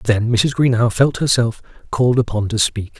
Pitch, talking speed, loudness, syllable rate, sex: 115 Hz, 180 wpm, -17 LUFS, 4.9 syllables/s, male